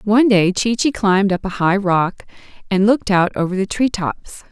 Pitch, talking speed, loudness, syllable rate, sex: 200 Hz, 215 wpm, -17 LUFS, 5.1 syllables/s, female